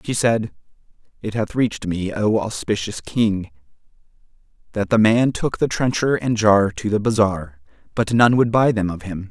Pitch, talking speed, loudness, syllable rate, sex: 110 Hz, 175 wpm, -19 LUFS, 4.6 syllables/s, male